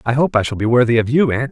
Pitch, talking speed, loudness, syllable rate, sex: 125 Hz, 355 wpm, -16 LUFS, 6.9 syllables/s, male